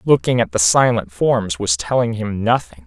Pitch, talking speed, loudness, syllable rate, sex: 105 Hz, 190 wpm, -17 LUFS, 4.7 syllables/s, male